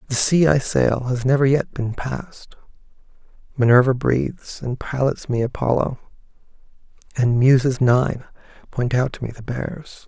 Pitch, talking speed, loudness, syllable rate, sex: 130 Hz, 145 wpm, -20 LUFS, 4.5 syllables/s, male